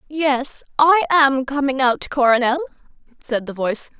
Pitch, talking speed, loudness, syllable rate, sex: 265 Hz, 135 wpm, -18 LUFS, 4.4 syllables/s, female